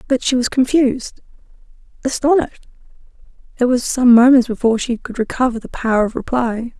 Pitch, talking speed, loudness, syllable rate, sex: 245 Hz, 140 wpm, -16 LUFS, 5.9 syllables/s, female